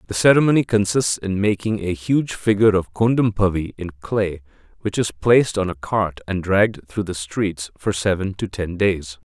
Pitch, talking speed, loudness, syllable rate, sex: 95 Hz, 180 wpm, -20 LUFS, 4.9 syllables/s, male